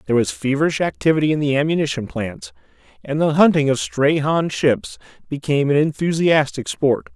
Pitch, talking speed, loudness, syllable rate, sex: 140 Hz, 160 wpm, -19 LUFS, 5.5 syllables/s, male